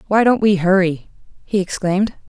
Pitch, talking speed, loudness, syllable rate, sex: 195 Hz, 150 wpm, -17 LUFS, 5.4 syllables/s, female